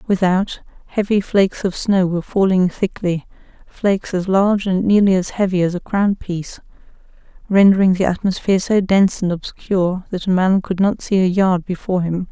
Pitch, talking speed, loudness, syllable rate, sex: 190 Hz, 175 wpm, -17 LUFS, 5.4 syllables/s, female